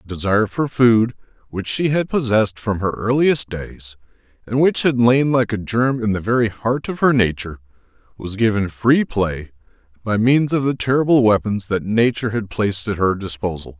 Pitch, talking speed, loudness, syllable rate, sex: 110 Hz, 185 wpm, -18 LUFS, 5.1 syllables/s, male